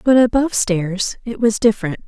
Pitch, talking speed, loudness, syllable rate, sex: 220 Hz, 175 wpm, -17 LUFS, 5.2 syllables/s, female